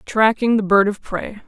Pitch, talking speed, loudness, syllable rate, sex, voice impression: 210 Hz, 205 wpm, -18 LUFS, 4.7 syllables/s, female, feminine, adult-like, slightly powerful, slightly muffled, slightly unique, slightly sharp